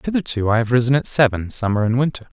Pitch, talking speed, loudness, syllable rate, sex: 125 Hz, 225 wpm, -18 LUFS, 6.7 syllables/s, male